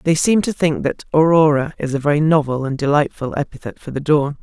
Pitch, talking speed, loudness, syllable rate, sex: 150 Hz, 215 wpm, -17 LUFS, 5.8 syllables/s, female